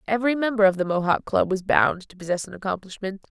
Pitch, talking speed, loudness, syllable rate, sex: 200 Hz, 210 wpm, -23 LUFS, 6.4 syllables/s, female